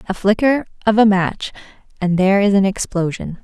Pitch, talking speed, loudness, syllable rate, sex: 200 Hz, 175 wpm, -16 LUFS, 5.5 syllables/s, female